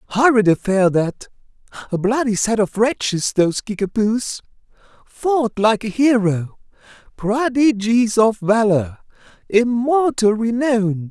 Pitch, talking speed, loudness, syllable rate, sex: 220 Hz, 80 wpm, -18 LUFS, 3.9 syllables/s, male